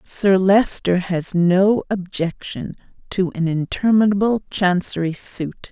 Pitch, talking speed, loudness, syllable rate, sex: 185 Hz, 105 wpm, -19 LUFS, 3.9 syllables/s, female